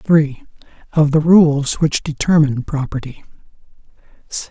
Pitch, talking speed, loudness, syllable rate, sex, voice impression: 150 Hz, 105 wpm, -16 LUFS, 4.3 syllables/s, male, masculine, adult-like, slightly soft, muffled, slightly raspy, calm, kind